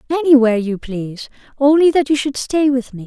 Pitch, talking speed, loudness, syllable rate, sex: 265 Hz, 195 wpm, -15 LUFS, 5.8 syllables/s, female